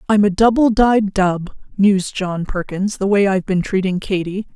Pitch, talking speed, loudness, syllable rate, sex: 195 Hz, 185 wpm, -17 LUFS, 4.9 syllables/s, female